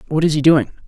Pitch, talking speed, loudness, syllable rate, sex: 150 Hz, 275 wpm, -15 LUFS, 7.1 syllables/s, male